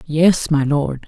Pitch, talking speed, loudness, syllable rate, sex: 150 Hz, 165 wpm, -17 LUFS, 3.1 syllables/s, female